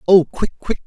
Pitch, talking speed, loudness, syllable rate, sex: 180 Hz, 205 wpm, -18 LUFS, 4.8 syllables/s, male